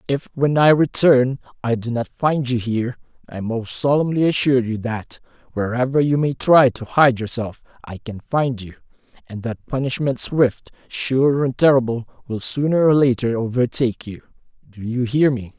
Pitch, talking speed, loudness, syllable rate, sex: 125 Hz, 170 wpm, -19 LUFS, 4.7 syllables/s, male